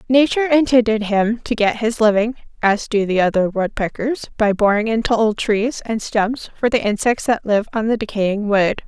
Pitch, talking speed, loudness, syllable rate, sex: 220 Hz, 190 wpm, -18 LUFS, 4.9 syllables/s, female